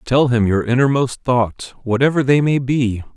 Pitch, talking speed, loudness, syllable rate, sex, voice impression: 125 Hz, 170 wpm, -17 LUFS, 4.5 syllables/s, male, masculine, adult-like, slightly thick, cool, sincere, reassuring, slightly elegant